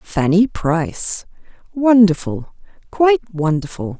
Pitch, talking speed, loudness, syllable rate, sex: 185 Hz, 75 wpm, -17 LUFS, 3.9 syllables/s, female